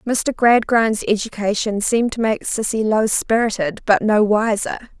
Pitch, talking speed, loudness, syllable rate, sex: 215 Hz, 145 wpm, -18 LUFS, 4.6 syllables/s, female